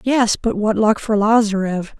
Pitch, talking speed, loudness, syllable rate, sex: 215 Hz, 180 wpm, -17 LUFS, 4.4 syllables/s, female